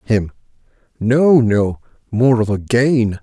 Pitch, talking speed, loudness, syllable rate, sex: 115 Hz, 130 wpm, -15 LUFS, 3.2 syllables/s, male